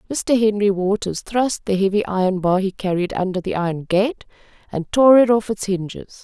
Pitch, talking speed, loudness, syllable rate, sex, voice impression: 200 Hz, 195 wpm, -19 LUFS, 5.0 syllables/s, female, feminine, adult-like, tensed, slightly weak, slightly dark, soft, raspy, intellectual, calm, elegant, lively, slightly strict, sharp